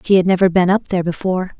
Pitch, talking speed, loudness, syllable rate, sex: 185 Hz, 265 wpm, -16 LUFS, 7.6 syllables/s, female